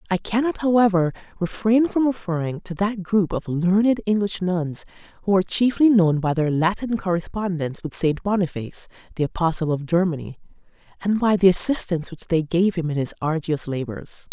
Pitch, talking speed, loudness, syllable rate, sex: 185 Hz, 170 wpm, -21 LUFS, 5.5 syllables/s, female